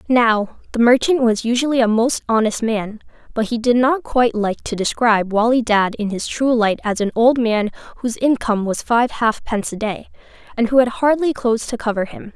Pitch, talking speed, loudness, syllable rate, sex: 230 Hz, 205 wpm, -18 LUFS, 5.4 syllables/s, female